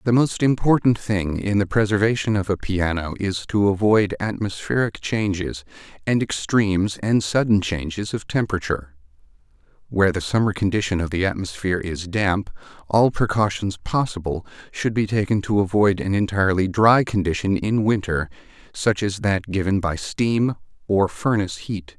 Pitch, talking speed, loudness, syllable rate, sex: 100 Hz, 145 wpm, -21 LUFS, 5.0 syllables/s, male